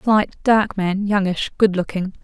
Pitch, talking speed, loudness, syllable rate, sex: 195 Hz, 160 wpm, -19 LUFS, 4.0 syllables/s, female